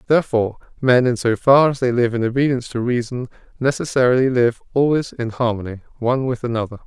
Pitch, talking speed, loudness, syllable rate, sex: 125 Hz, 175 wpm, -19 LUFS, 6.4 syllables/s, male